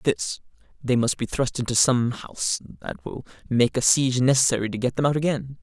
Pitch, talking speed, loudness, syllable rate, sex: 130 Hz, 190 wpm, -23 LUFS, 5.4 syllables/s, male